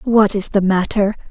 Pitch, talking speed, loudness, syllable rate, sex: 205 Hz, 185 wpm, -16 LUFS, 4.6 syllables/s, female